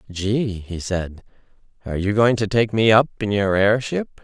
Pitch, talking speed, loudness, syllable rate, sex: 105 Hz, 185 wpm, -20 LUFS, 4.5 syllables/s, male